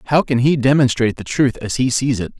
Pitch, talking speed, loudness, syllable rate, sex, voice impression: 130 Hz, 250 wpm, -17 LUFS, 6.1 syllables/s, male, very masculine, very adult-like, middle-aged, very thick, tensed, slightly powerful, bright, slightly soft, slightly clear, very fluent, very cool, very intellectual, refreshing, sincere, very calm, friendly, reassuring, slightly unique, elegant, slightly wild, slightly sweet, slightly lively, very kind